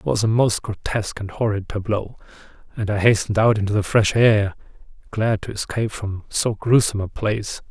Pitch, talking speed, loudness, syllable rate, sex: 105 Hz, 185 wpm, -21 LUFS, 5.6 syllables/s, male